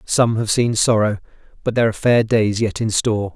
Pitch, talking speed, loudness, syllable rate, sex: 110 Hz, 215 wpm, -18 LUFS, 5.7 syllables/s, male